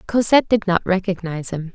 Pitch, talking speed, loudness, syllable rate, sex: 190 Hz, 170 wpm, -19 LUFS, 6.2 syllables/s, female